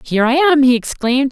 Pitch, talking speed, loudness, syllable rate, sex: 265 Hz, 230 wpm, -14 LUFS, 6.4 syllables/s, female